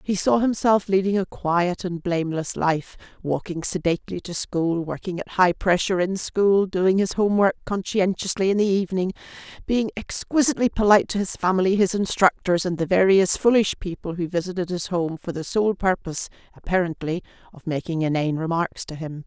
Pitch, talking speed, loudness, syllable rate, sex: 185 Hz, 170 wpm, -22 LUFS, 5.5 syllables/s, female